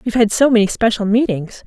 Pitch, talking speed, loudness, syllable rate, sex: 220 Hz, 215 wpm, -15 LUFS, 6.4 syllables/s, female